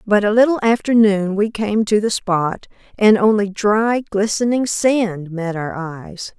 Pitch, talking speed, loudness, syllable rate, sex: 210 Hz, 170 wpm, -17 LUFS, 4.0 syllables/s, female